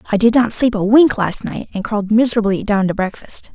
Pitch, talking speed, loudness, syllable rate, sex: 215 Hz, 235 wpm, -16 LUFS, 5.9 syllables/s, female